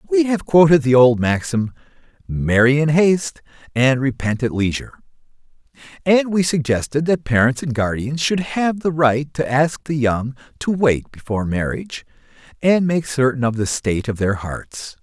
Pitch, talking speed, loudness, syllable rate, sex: 140 Hz, 165 wpm, -18 LUFS, 4.8 syllables/s, male